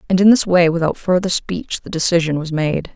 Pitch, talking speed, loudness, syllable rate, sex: 175 Hz, 225 wpm, -17 LUFS, 5.4 syllables/s, female